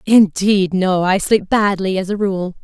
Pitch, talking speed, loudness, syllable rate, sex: 195 Hz, 180 wpm, -16 LUFS, 4.1 syllables/s, female